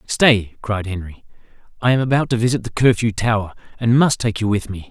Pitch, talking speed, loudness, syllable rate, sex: 110 Hz, 210 wpm, -18 LUFS, 5.6 syllables/s, male